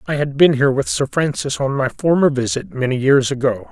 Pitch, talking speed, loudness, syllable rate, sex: 140 Hz, 225 wpm, -17 LUFS, 5.6 syllables/s, male